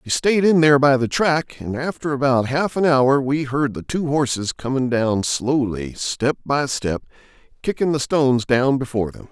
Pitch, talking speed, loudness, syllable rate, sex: 135 Hz, 195 wpm, -19 LUFS, 4.7 syllables/s, male